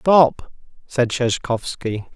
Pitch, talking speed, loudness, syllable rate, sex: 130 Hz, 85 wpm, -20 LUFS, 2.9 syllables/s, male